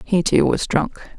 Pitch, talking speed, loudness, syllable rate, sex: 180 Hz, 200 wpm, -19 LUFS, 4.4 syllables/s, female